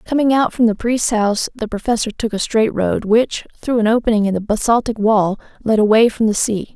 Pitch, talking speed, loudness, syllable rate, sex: 220 Hz, 220 wpm, -17 LUFS, 5.4 syllables/s, female